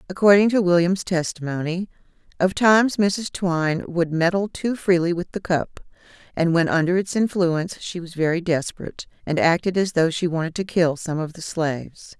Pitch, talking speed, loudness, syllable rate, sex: 175 Hz, 175 wpm, -21 LUFS, 5.2 syllables/s, female